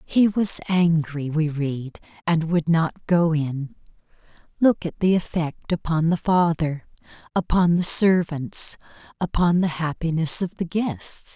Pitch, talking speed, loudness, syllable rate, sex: 165 Hz, 135 wpm, -22 LUFS, 3.9 syllables/s, female